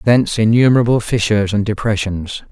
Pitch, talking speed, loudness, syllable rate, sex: 110 Hz, 120 wpm, -15 LUFS, 6.0 syllables/s, male